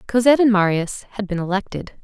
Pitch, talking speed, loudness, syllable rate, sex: 210 Hz, 175 wpm, -19 LUFS, 6.3 syllables/s, female